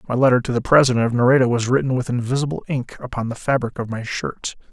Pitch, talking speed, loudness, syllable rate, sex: 125 Hz, 230 wpm, -19 LUFS, 6.7 syllables/s, male